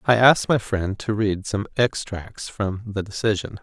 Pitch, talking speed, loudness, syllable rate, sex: 105 Hz, 180 wpm, -22 LUFS, 4.1 syllables/s, male